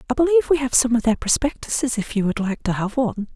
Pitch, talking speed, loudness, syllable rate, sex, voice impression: 240 Hz, 270 wpm, -20 LUFS, 6.7 syllables/s, female, feminine, adult-like, fluent, slightly sweet